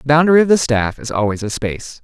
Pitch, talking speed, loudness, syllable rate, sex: 135 Hz, 265 wpm, -16 LUFS, 6.5 syllables/s, male